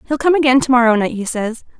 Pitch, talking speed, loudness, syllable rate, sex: 250 Hz, 270 wpm, -15 LUFS, 6.7 syllables/s, female